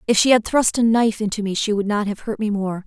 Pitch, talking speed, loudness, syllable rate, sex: 215 Hz, 315 wpm, -19 LUFS, 6.3 syllables/s, female